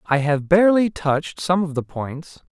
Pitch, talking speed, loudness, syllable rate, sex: 160 Hz, 190 wpm, -20 LUFS, 4.7 syllables/s, male